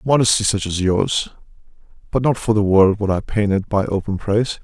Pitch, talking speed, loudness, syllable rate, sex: 105 Hz, 195 wpm, -18 LUFS, 5.3 syllables/s, male